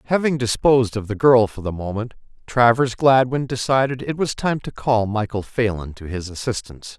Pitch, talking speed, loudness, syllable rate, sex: 120 Hz, 180 wpm, -20 LUFS, 5.2 syllables/s, male